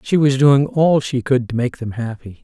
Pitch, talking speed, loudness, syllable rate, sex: 130 Hz, 245 wpm, -17 LUFS, 4.7 syllables/s, male